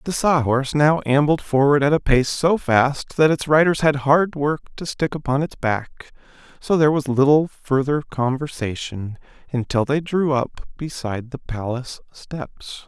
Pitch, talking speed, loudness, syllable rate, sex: 140 Hz, 170 wpm, -20 LUFS, 4.6 syllables/s, male